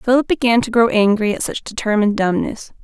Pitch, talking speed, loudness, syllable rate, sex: 225 Hz, 190 wpm, -17 LUFS, 5.9 syllables/s, female